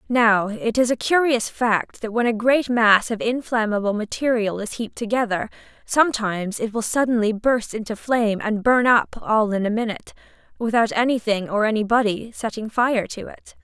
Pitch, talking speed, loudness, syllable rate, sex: 225 Hz, 170 wpm, -21 LUFS, 5.2 syllables/s, female